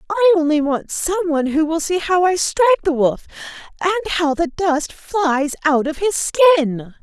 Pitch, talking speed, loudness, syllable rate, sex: 330 Hz, 180 wpm, -17 LUFS, 5.6 syllables/s, female